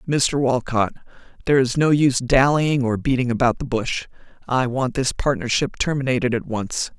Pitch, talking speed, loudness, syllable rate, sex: 130 Hz, 165 wpm, -20 LUFS, 5.1 syllables/s, female